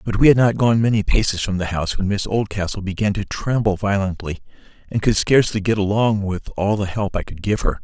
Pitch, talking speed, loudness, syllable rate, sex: 100 Hz, 230 wpm, -20 LUFS, 5.8 syllables/s, male